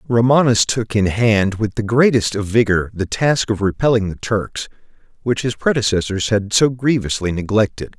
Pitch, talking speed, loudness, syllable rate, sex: 110 Hz, 160 wpm, -17 LUFS, 4.7 syllables/s, male